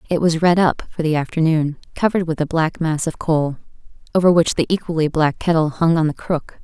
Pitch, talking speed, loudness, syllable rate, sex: 160 Hz, 215 wpm, -18 LUFS, 5.7 syllables/s, female